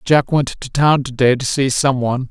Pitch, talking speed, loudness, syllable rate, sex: 135 Hz, 235 wpm, -16 LUFS, 5.0 syllables/s, male